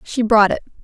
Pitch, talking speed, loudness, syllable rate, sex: 225 Hz, 215 wpm, -15 LUFS, 5.6 syllables/s, female